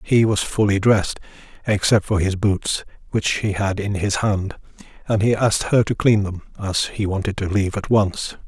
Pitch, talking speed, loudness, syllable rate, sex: 100 Hz, 200 wpm, -20 LUFS, 4.9 syllables/s, male